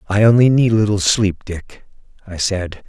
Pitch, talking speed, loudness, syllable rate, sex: 100 Hz, 190 wpm, -15 LUFS, 4.9 syllables/s, male